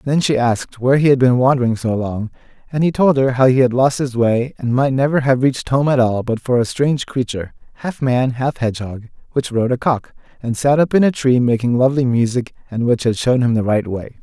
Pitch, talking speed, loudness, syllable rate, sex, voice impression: 125 Hz, 245 wpm, -17 LUFS, 5.8 syllables/s, male, very masculine, very adult-like, middle-aged, very thick, slightly relaxed, slightly powerful, weak, slightly dark, soft, clear, fluent, cool, very intellectual, slightly refreshing, sincere, very calm, mature, friendly, reassuring, unique, slightly elegant, wild, sweet, lively